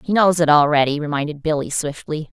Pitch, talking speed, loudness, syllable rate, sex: 155 Hz, 175 wpm, -18 LUFS, 5.8 syllables/s, female